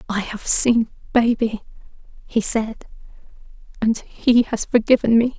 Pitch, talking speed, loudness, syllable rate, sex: 225 Hz, 125 wpm, -19 LUFS, 4.1 syllables/s, female